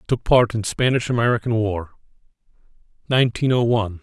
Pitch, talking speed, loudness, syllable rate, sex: 115 Hz, 135 wpm, -20 LUFS, 5.9 syllables/s, male